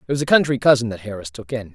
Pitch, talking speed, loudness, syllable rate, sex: 120 Hz, 310 wpm, -19 LUFS, 7.0 syllables/s, male